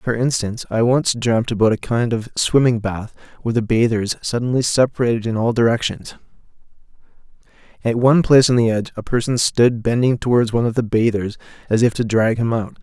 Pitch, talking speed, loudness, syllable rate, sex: 115 Hz, 185 wpm, -18 LUFS, 5.9 syllables/s, male